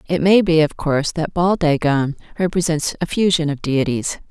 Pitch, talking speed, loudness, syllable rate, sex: 160 Hz, 180 wpm, -18 LUFS, 5.1 syllables/s, female